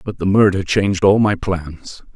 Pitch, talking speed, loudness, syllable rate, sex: 95 Hz, 195 wpm, -16 LUFS, 4.6 syllables/s, male